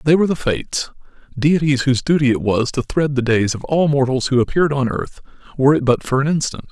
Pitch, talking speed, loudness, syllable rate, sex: 135 Hz, 230 wpm, -17 LUFS, 6.2 syllables/s, male